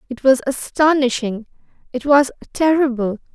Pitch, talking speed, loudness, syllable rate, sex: 260 Hz, 105 wpm, -17 LUFS, 4.7 syllables/s, female